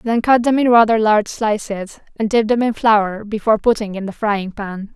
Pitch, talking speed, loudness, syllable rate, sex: 215 Hz, 220 wpm, -17 LUFS, 5.1 syllables/s, female